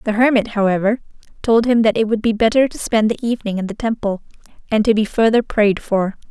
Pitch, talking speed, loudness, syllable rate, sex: 220 Hz, 220 wpm, -17 LUFS, 5.9 syllables/s, female